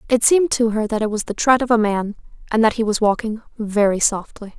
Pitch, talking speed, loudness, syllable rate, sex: 220 Hz, 250 wpm, -18 LUFS, 5.9 syllables/s, female